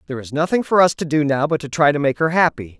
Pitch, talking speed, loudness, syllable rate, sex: 150 Hz, 320 wpm, -18 LUFS, 6.9 syllables/s, male